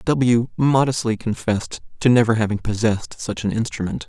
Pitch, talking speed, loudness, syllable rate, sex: 115 Hz, 145 wpm, -20 LUFS, 5.3 syllables/s, male